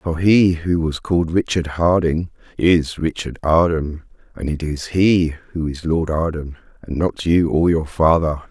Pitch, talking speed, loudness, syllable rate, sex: 80 Hz, 170 wpm, -18 LUFS, 4.1 syllables/s, male